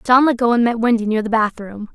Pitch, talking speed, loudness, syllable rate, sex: 230 Hz, 275 wpm, -16 LUFS, 6.1 syllables/s, female